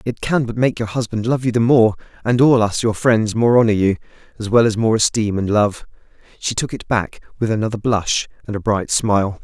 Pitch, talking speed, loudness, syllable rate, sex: 110 Hz, 225 wpm, -18 LUFS, 5.4 syllables/s, male